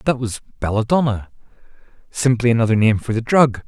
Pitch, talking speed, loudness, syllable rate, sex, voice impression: 115 Hz, 145 wpm, -18 LUFS, 5.9 syllables/s, male, very masculine, adult-like, middle-aged, thick, tensed, powerful, slightly dark, slightly hard, slightly muffled, fluent, cool, very intellectual, refreshing, very sincere, very calm, mature, friendly, very reassuring, unique, slightly elegant, very wild, sweet, lively, kind, intense